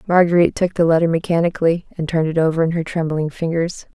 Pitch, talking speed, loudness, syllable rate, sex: 165 Hz, 195 wpm, -18 LUFS, 6.8 syllables/s, female